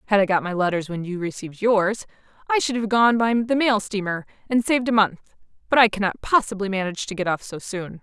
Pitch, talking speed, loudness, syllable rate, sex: 205 Hz, 230 wpm, -22 LUFS, 6.1 syllables/s, female